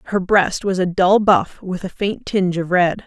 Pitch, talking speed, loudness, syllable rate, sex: 190 Hz, 235 wpm, -18 LUFS, 4.7 syllables/s, female